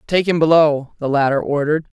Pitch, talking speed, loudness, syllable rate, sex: 150 Hz, 180 wpm, -17 LUFS, 5.9 syllables/s, female